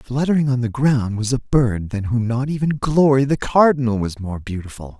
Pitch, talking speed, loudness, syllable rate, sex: 125 Hz, 205 wpm, -19 LUFS, 5.1 syllables/s, male